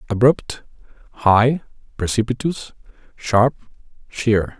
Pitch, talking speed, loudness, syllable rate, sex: 115 Hz, 65 wpm, -19 LUFS, 3.7 syllables/s, male